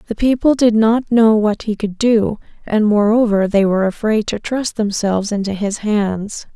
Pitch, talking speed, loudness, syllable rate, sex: 215 Hz, 185 wpm, -16 LUFS, 4.6 syllables/s, female